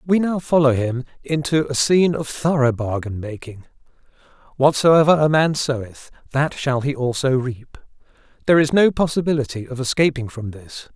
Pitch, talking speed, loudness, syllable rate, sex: 140 Hz, 155 wpm, -19 LUFS, 5.2 syllables/s, male